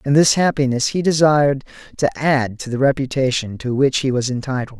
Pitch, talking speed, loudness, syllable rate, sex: 135 Hz, 190 wpm, -18 LUFS, 5.4 syllables/s, male